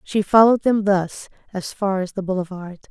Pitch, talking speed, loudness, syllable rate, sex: 195 Hz, 185 wpm, -19 LUFS, 5.3 syllables/s, female